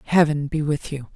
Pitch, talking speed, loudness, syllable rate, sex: 150 Hz, 210 wpm, -22 LUFS, 5.1 syllables/s, female